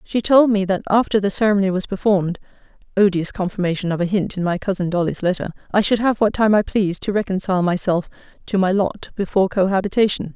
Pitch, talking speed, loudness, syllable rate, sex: 195 Hz, 195 wpm, -19 LUFS, 5.0 syllables/s, female